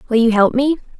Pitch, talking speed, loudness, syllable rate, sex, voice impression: 245 Hz, 240 wpm, -15 LUFS, 6.8 syllables/s, female, very feminine, young, cute, refreshing, kind